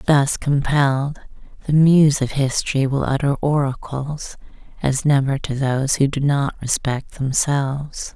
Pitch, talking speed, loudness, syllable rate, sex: 140 Hz, 130 wpm, -19 LUFS, 4.2 syllables/s, female